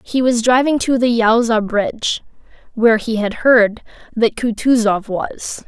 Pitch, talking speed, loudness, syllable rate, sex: 230 Hz, 150 wpm, -16 LUFS, 4.2 syllables/s, female